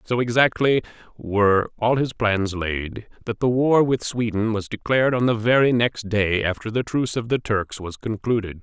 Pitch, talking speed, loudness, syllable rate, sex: 110 Hz, 190 wpm, -21 LUFS, 4.8 syllables/s, male